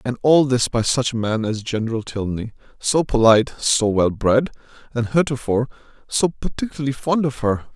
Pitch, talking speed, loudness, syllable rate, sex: 125 Hz, 170 wpm, -20 LUFS, 5.5 syllables/s, male